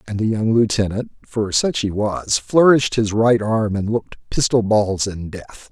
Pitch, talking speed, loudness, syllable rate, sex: 105 Hz, 190 wpm, -18 LUFS, 4.4 syllables/s, male